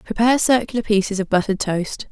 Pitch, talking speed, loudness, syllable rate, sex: 210 Hz, 170 wpm, -19 LUFS, 6.3 syllables/s, female